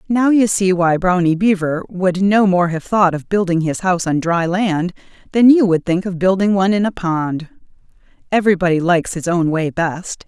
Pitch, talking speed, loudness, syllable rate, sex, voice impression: 180 Hz, 200 wpm, -16 LUFS, 5.1 syllables/s, female, feminine, adult-like, tensed, powerful, slightly muffled, fluent, intellectual, elegant, lively, slightly sharp